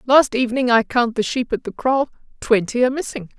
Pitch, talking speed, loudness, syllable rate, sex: 240 Hz, 195 wpm, -19 LUFS, 5.8 syllables/s, female